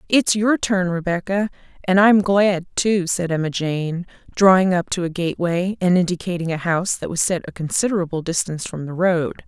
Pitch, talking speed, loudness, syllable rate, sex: 180 Hz, 185 wpm, -19 LUFS, 5.3 syllables/s, female